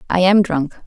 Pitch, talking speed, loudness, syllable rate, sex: 180 Hz, 205 wpm, -16 LUFS, 5.1 syllables/s, female